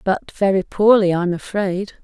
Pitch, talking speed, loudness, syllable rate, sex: 190 Hz, 145 wpm, -18 LUFS, 4.3 syllables/s, female